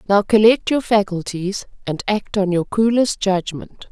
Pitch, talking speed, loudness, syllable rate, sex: 205 Hz, 155 wpm, -18 LUFS, 4.3 syllables/s, female